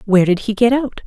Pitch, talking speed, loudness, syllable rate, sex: 220 Hz, 280 wpm, -16 LUFS, 6.7 syllables/s, female